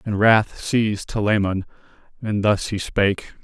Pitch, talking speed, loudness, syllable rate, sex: 105 Hz, 140 wpm, -20 LUFS, 4.5 syllables/s, male